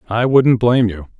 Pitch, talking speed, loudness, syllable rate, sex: 115 Hz, 200 wpm, -14 LUFS, 5.4 syllables/s, male